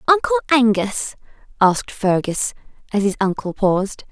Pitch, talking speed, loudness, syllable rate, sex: 215 Hz, 115 wpm, -19 LUFS, 4.9 syllables/s, female